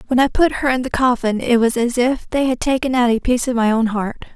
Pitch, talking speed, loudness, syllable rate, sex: 245 Hz, 290 wpm, -17 LUFS, 5.9 syllables/s, female